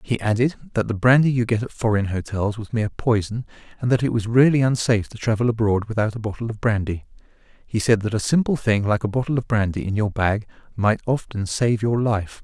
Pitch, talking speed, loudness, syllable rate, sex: 110 Hz, 220 wpm, -21 LUFS, 5.9 syllables/s, male